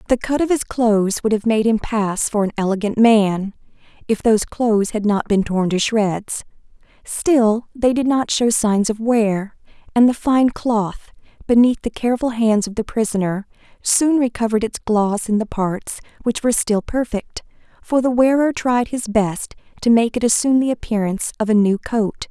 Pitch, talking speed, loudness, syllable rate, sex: 225 Hz, 185 wpm, -18 LUFS, 4.8 syllables/s, female